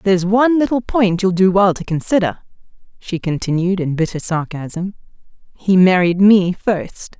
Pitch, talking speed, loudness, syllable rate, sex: 185 Hz, 150 wpm, -16 LUFS, 4.8 syllables/s, female